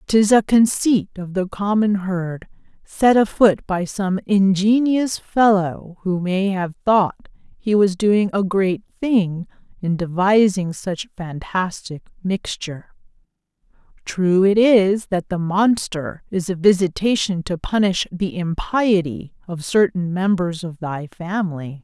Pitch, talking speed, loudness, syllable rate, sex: 190 Hz, 130 wpm, -19 LUFS, 3.7 syllables/s, female